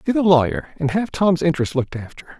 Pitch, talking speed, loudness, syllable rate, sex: 155 Hz, 225 wpm, -19 LUFS, 6.6 syllables/s, male